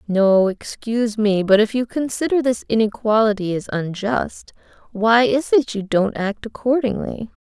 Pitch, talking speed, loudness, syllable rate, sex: 220 Hz, 145 wpm, -19 LUFS, 4.4 syllables/s, female